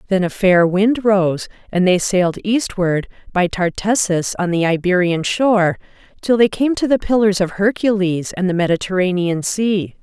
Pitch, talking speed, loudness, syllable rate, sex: 190 Hz, 160 wpm, -17 LUFS, 4.6 syllables/s, female